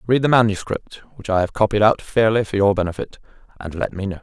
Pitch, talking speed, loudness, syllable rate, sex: 105 Hz, 225 wpm, -19 LUFS, 3.5 syllables/s, male